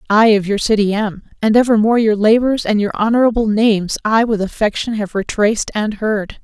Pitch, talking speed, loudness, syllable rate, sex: 215 Hz, 185 wpm, -15 LUFS, 5.6 syllables/s, female